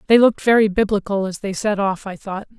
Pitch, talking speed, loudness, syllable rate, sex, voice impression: 205 Hz, 230 wpm, -19 LUFS, 6.0 syllables/s, female, feminine, slightly gender-neutral, slightly young, adult-like, slightly thick, tensed, slightly powerful, slightly bright, hard, slightly muffled, fluent, cool, very intellectual, sincere, calm, slightly mature, friendly, reassuring, slightly unique, elegant, slightly sweet, slightly lively, slightly strict, slightly sharp